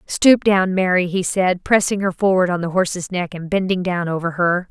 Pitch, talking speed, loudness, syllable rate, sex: 180 Hz, 215 wpm, -18 LUFS, 5.0 syllables/s, female